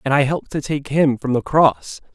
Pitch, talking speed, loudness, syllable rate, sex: 140 Hz, 250 wpm, -18 LUFS, 5.2 syllables/s, male